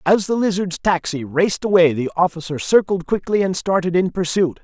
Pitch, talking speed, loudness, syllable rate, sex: 180 Hz, 180 wpm, -18 LUFS, 5.4 syllables/s, male